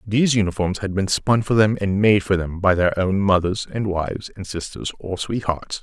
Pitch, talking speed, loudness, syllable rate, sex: 100 Hz, 215 wpm, -20 LUFS, 5.1 syllables/s, male